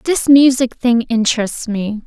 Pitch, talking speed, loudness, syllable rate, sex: 240 Hz, 145 wpm, -14 LUFS, 4.2 syllables/s, female